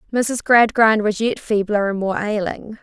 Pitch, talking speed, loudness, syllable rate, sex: 215 Hz, 170 wpm, -18 LUFS, 4.4 syllables/s, female